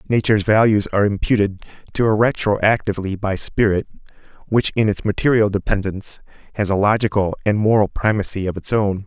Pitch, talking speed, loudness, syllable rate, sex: 105 Hz, 150 wpm, -18 LUFS, 5.8 syllables/s, male